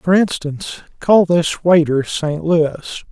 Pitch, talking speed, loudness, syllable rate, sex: 165 Hz, 135 wpm, -16 LUFS, 3.6 syllables/s, male